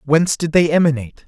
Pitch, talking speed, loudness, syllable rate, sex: 155 Hz, 190 wpm, -16 LUFS, 7.0 syllables/s, male